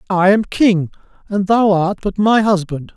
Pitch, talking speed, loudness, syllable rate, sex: 195 Hz, 180 wpm, -15 LUFS, 4.3 syllables/s, male